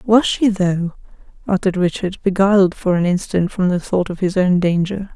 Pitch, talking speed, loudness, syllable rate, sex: 185 Hz, 185 wpm, -17 LUFS, 5.1 syllables/s, female